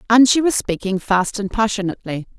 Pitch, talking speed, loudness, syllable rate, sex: 210 Hz, 175 wpm, -18 LUFS, 5.7 syllables/s, female